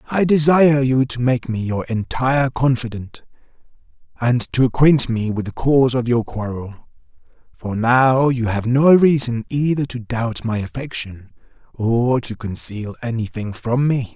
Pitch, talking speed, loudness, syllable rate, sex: 125 Hz, 155 wpm, -18 LUFS, 4.4 syllables/s, male